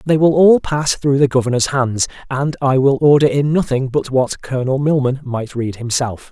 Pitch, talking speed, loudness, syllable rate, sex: 135 Hz, 200 wpm, -16 LUFS, 4.9 syllables/s, male